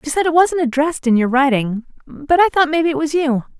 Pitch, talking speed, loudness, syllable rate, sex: 290 Hz, 250 wpm, -16 LUFS, 6.0 syllables/s, female